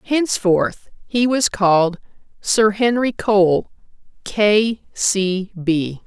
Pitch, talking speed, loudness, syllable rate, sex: 205 Hz, 100 wpm, -18 LUFS, 3.0 syllables/s, female